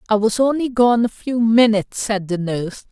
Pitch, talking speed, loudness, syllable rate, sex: 220 Hz, 205 wpm, -18 LUFS, 5.2 syllables/s, female